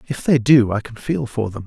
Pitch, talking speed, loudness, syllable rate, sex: 120 Hz, 290 wpm, -18 LUFS, 5.2 syllables/s, male